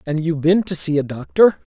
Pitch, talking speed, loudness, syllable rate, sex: 155 Hz, 240 wpm, -18 LUFS, 5.9 syllables/s, male